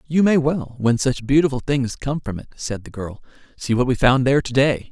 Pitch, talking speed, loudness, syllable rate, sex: 130 Hz, 245 wpm, -20 LUFS, 5.4 syllables/s, male